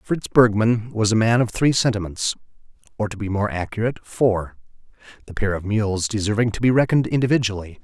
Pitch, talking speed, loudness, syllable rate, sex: 110 Hz, 170 wpm, -20 LUFS, 5.9 syllables/s, male